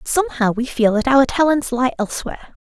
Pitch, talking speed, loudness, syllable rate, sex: 255 Hz, 205 wpm, -18 LUFS, 6.2 syllables/s, female